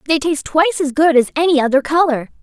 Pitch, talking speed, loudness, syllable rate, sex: 295 Hz, 225 wpm, -15 LUFS, 6.7 syllables/s, female